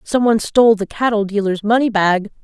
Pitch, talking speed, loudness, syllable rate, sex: 215 Hz, 195 wpm, -16 LUFS, 5.8 syllables/s, female